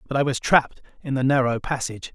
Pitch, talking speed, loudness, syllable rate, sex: 130 Hz, 225 wpm, -22 LUFS, 6.7 syllables/s, male